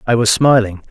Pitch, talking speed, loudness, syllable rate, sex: 115 Hz, 200 wpm, -13 LUFS, 5.5 syllables/s, male